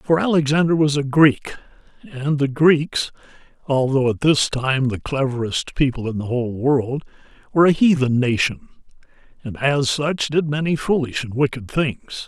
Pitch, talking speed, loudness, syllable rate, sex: 140 Hz, 155 wpm, -19 LUFS, 4.6 syllables/s, male